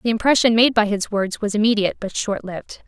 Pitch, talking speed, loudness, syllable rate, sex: 215 Hz, 210 wpm, -19 LUFS, 6.1 syllables/s, female